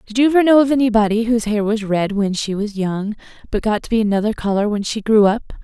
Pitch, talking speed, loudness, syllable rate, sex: 215 Hz, 255 wpm, -17 LUFS, 6.3 syllables/s, female